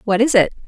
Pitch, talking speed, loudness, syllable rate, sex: 225 Hz, 265 wpm, -15 LUFS, 6.7 syllables/s, female